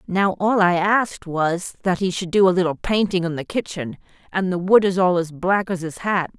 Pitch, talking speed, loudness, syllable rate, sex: 185 Hz, 235 wpm, -20 LUFS, 5.1 syllables/s, female